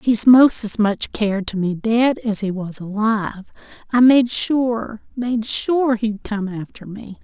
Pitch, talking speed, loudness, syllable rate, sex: 220 Hz, 160 wpm, -18 LUFS, 3.6 syllables/s, female